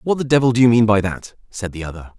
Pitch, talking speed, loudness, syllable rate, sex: 110 Hz, 300 wpm, -16 LUFS, 6.8 syllables/s, male